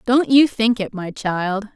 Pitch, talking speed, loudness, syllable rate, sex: 220 Hz, 205 wpm, -18 LUFS, 3.8 syllables/s, female